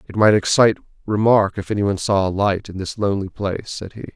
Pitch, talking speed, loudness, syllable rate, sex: 100 Hz, 215 wpm, -19 LUFS, 6.5 syllables/s, male